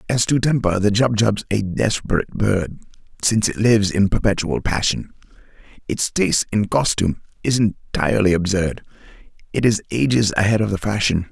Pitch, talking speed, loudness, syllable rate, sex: 105 Hz, 150 wpm, -19 LUFS, 5.4 syllables/s, male